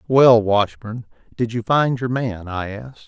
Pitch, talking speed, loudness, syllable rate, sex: 115 Hz, 175 wpm, -19 LUFS, 4.2 syllables/s, male